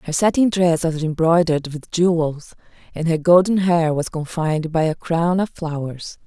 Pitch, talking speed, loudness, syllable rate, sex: 165 Hz, 170 wpm, -19 LUFS, 4.8 syllables/s, female